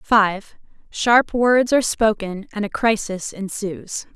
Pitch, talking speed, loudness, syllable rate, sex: 215 Hz, 115 wpm, -20 LUFS, 4.5 syllables/s, female